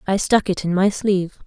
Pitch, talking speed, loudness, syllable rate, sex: 195 Hz, 245 wpm, -19 LUFS, 5.6 syllables/s, female